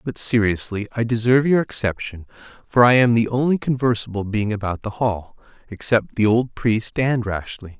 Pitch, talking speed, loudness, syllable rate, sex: 115 Hz, 170 wpm, -20 LUFS, 5.2 syllables/s, male